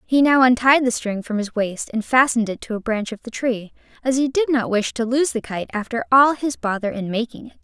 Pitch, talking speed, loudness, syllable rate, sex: 240 Hz, 260 wpm, -20 LUFS, 5.5 syllables/s, female